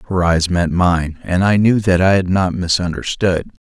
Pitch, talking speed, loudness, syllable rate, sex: 90 Hz, 195 wpm, -16 LUFS, 4.6 syllables/s, male